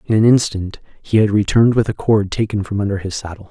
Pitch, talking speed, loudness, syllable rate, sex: 105 Hz, 240 wpm, -17 LUFS, 6.2 syllables/s, male